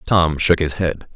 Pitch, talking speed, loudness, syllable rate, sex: 80 Hz, 205 wpm, -18 LUFS, 4.0 syllables/s, male